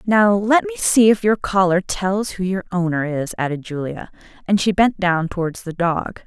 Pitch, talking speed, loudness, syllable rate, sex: 190 Hz, 200 wpm, -19 LUFS, 4.6 syllables/s, female